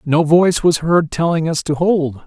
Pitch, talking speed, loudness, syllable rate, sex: 160 Hz, 210 wpm, -15 LUFS, 4.6 syllables/s, male